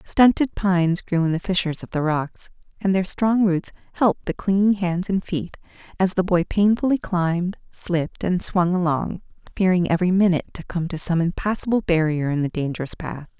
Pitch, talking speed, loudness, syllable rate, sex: 180 Hz, 185 wpm, -21 LUFS, 5.4 syllables/s, female